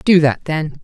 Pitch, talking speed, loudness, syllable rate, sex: 155 Hz, 215 wpm, -16 LUFS, 4.4 syllables/s, female